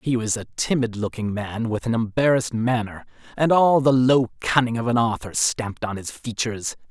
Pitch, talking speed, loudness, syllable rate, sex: 115 Hz, 190 wpm, -22 LUFS, 5.3 syllables/s, male